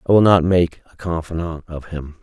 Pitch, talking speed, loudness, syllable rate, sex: 85 Hz, 215 wpm, -18 LUFS, 5.1 syllables/s, male